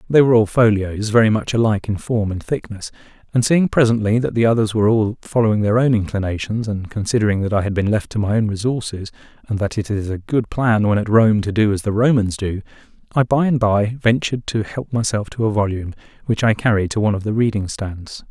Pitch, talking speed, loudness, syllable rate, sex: 110 Hz, 230 wpm, -18 LUFS, 6.0 syllables/s, male